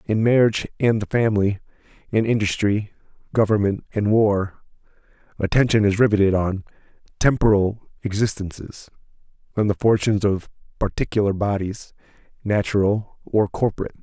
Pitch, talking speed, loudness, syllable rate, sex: 105 Hz, 105 wpm, -21 LUFS, 5.4 syllables/s, male